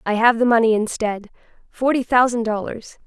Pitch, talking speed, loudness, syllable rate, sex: 230 Hz, 135 wpm, -18 LUFS, 5.2 syllables/s, female